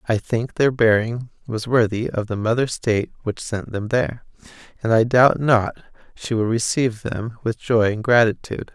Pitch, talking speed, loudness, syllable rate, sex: 115 Hz, 180 wpm, -20 LUFS, 4.9 syllables/s, male